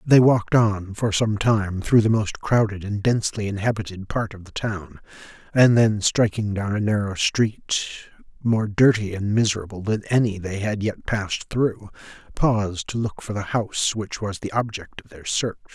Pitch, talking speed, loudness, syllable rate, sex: 105 Hz, 185 wpm, -22 LUFS, 4.7 syllables/s, male